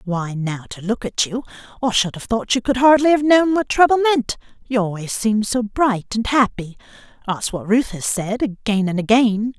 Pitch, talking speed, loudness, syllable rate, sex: 225 Hz, 205 wpm, -18 LUFS, 4.9 syllables/s, female